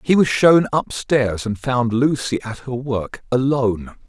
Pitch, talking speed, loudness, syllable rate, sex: 125 Hz, 175 wpm, -19 LUFS, 4.0 syllables/s, male